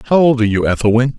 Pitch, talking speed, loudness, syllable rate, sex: 120 Hz, 255 wpm, -14 LUFS, 8.3 syllables/s, male